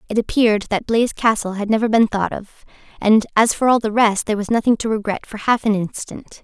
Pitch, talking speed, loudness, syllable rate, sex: 215 Hz, 235 wpm, -18 LUFS, 5.9 syllables/s, female